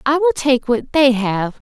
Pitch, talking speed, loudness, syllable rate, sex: 260 Hz, 205 wpm, -17 LUFS, 4.1 syllables/s, female